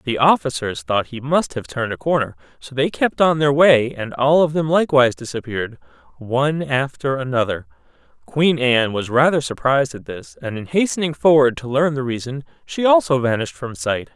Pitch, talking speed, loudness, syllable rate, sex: 135 Hz, 180 wpm, -18 LUFS, 5.4 syllables/s, male